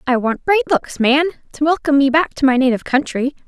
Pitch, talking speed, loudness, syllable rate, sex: 285 Hz, 225 wpm, -16 LUFS, 6.3 syllables/s, female